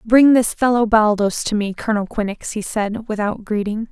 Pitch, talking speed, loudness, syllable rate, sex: 215 Hz, 185 wpm, -18 LUFS, 5.0 syllables/s, female